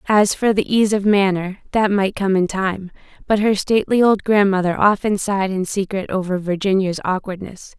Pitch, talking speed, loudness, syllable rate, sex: 195 Hz, 175 wpm, -18 LUFS, 5.1 syllables/s, female